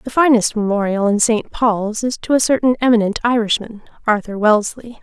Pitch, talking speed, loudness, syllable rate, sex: 225 Hz, 165 wpm, -16 LUFS, 5.5 syllables/s, female